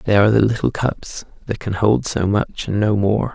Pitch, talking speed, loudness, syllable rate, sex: 105 Hz, 235 wpm, -18 LUFS, 4.9 syllables/s, male